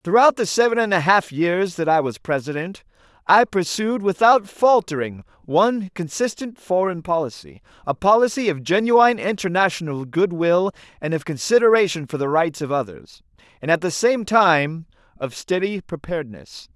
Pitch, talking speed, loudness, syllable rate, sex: 175 Hz, 150 wpm, -20 LUFS, 5.0 syllables/s, male